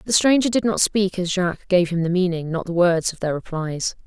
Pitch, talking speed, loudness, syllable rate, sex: 180 Hz, 250 wpm, -20 LUFS, 5.5 syllables/s, female